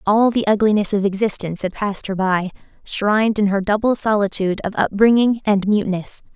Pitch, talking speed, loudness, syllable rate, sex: 205 Hz, 170 wpm, -18 LUFS, 5.8 syllables/s, female